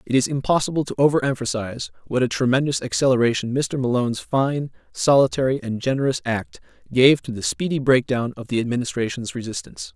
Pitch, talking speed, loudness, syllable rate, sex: 130 Hz, 155 wpm, -21 LUFS, 6.1 syllables/s, male